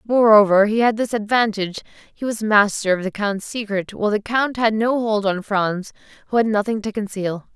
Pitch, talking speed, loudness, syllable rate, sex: 210 Hz, 200 wpm, -19 LUFS, 5.2 syllables/s, female